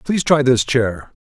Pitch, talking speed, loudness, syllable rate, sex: 125 Hz, 195 wpm, -16 LUFS, 4.8 syllables/s, male